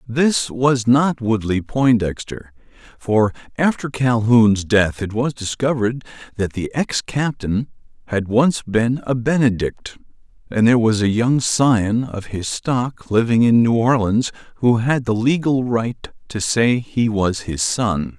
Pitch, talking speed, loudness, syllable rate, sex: 115 Hz, 140 wpm, -18 LUFS, 3.9 syllables/s, male